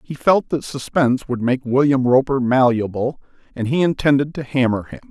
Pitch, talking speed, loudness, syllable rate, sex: 130 Hz, 175 wpm, -18 LUFS, 5.2 syllables/s, male